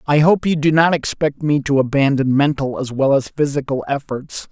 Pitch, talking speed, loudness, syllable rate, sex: 145 Hz, 200 wpm, -17 LUFS, 5.1 syllables/s, male